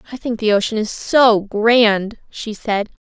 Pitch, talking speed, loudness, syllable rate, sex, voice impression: 220 Hz, 175 wpm, -16 LUFS, 3.9 syllables/s, female, very feminine, young, very thin, tensed, very powerful, very bright, hard, very clear, very fluent, slightly raspy, very cute, intellectual, very refreshing, sincere, slightly calm, very friendly, very reassuring, very unique, elegant, slightly wild, sweet, lively, kind, slightly intense, slightly modest, light